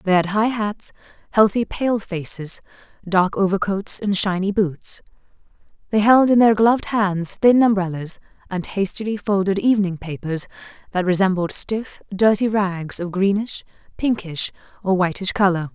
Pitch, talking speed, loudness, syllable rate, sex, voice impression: 195 Hz, 135 wpm, -20 LUFS, 4.6 syllables/s, female, feminine, adult-like, fluent, slightly cute, slightly refreshing, friendly, sweet